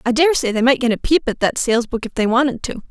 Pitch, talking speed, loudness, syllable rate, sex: 245 Hz, 310 wpm, -17 LUFS, 6.6 syllables/s, female